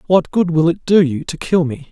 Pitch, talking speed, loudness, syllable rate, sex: 165 Hz, 285 wpm, -16 LUFS, 5.1 syllables/s, male